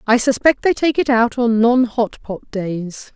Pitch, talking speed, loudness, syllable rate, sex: 235 Hz, 210 wpm, -17 LUFS, 4.0 syllables/s, female